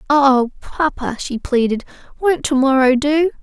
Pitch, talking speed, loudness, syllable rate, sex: 275 Hz, 140 wpm, -17 LUFS, 4.1 syllables/s, female